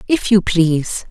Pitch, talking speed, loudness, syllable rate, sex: 190 Hz, 165 wpm, -15 LUFS, 4.4 syllables/s, female